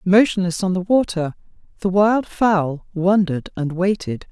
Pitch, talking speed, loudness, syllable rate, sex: 185 Hz, 140 wpm, -19 LUFS, 4.4 syllables/s, female